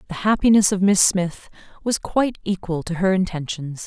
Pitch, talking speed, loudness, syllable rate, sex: 185 Hz, 170 wpm, -20 LUFS, 5.2 syllables/s, female